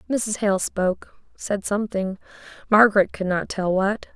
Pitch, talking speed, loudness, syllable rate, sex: 200 Hz, 115 wpm, -22 LUFS, 4.7 syllables/s, female